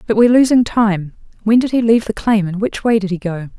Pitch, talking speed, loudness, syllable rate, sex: 210 Hz, 270 wpm, -15 LUFS, 6.2 syllables/s, female